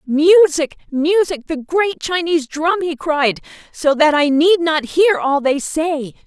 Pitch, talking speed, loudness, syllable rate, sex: 315 Hz, 165 wpm, -16 LUFS, 3.8 syllables/s, female